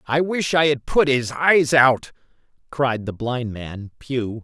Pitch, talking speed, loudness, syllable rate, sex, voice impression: 135 Hz, 175 wpm, -19 LUFS, 3.6 syllables/s, male, masculine, adult-like, tensed, powerful, bright, clear, cool, calm, slightly mature, reassuring, wild, lively, kind